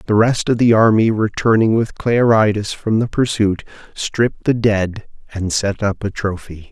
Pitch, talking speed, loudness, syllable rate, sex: 105 Hz, 170 wpm, -16 LUFS, 4.6 syllables/s, male